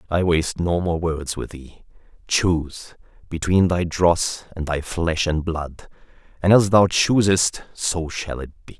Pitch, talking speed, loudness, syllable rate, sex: 85 Hz, 155 wpm, -21 LUFS, 4.0 syllables/s, male